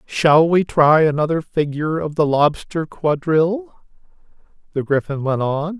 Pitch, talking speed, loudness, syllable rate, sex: 160 Hz, 135 wpm, -18 LUFS, 4.4 syllables/s, male